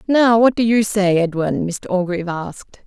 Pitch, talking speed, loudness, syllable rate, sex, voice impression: 200 Hz, 190 wpm, -17 LUFS, 4.9 syllables/s, female, very feminine, middle-aged, slightly thin, slightly tensed, slightly weak, bright, soft, clear, fluent, slightly raspy, slightly cute, intellectual, refreshing, sincere, very calm, very friendly, very reassuring, unique, very elegant, sweet, lively, very kind, slightly modest, slightly light